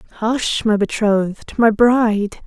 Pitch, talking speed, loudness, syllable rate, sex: 220 Hz, 120 wpm, -17 LUFS, 4.0 syllables/s, female